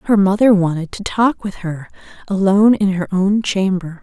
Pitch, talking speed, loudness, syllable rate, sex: 195 Hz, 180 wpm, -16 LUFS, 4.8 syllables/s, female